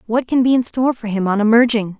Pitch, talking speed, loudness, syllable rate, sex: 230 Hz, 270 wpm, -16 LUFS, 6.6 syllables/s, female